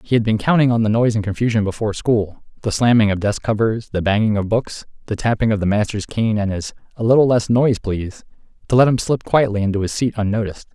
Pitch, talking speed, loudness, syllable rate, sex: 110 Hz, 225 wpm, -18 LUFS, 6.5 syllables/s, male